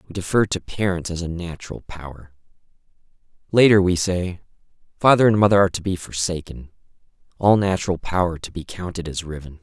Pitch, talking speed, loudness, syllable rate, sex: 90 Hz, 160 wpm, -20 LUFS, 5.9 syllables/s, male